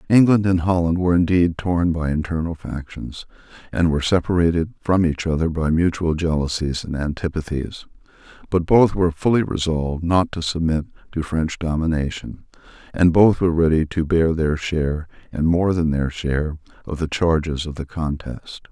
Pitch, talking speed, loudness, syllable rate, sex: 80 Hz, 160 wpm, -20 LUFS, 5.1 syllables/s, male